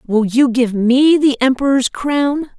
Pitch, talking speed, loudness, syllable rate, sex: 260 Hz, 160 wpm, -14 LUFS, 3.7 syllables/s, female